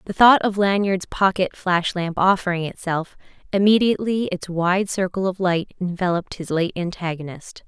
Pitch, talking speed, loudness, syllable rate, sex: 185 Hz, 150 wpm, -21 LUFS, 4.9 syllables/s, female